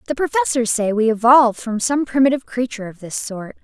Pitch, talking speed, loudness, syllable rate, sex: 240 Hz, 200 wpm, -18 LUFS, 6.2 syllables/s, female